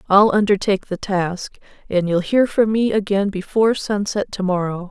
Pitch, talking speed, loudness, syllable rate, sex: 200 Hz, 170 wpm, -19 LUFS, 5.0 syllables/s, female